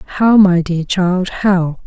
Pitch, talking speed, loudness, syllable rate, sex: 185 Hz, 160 wpm, -13 LUFS, 3.5 syllables/s, female